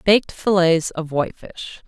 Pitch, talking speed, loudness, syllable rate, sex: 175 Hz, 130 wpm, -19 LUFS, 4.7 syllables/s, female